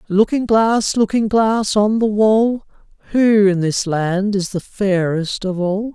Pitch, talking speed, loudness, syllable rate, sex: 205 Hz, 160 wpm, -16 LUFS, 3.6 syllables/s, male